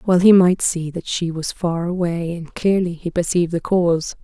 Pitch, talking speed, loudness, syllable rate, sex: 175 Hz, 210 wpm, -19 LUFS, 5.0 syllables/s, female